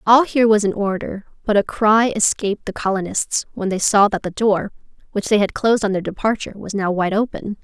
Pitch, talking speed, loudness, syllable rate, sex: 205 Hz, 220 wpm, -19 LUFS, 5.8 syllables/s, female